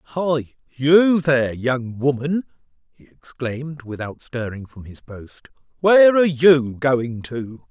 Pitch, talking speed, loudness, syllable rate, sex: 135 Hz, 130 wpm, -19 LUFS, 4.1 syllables/s, male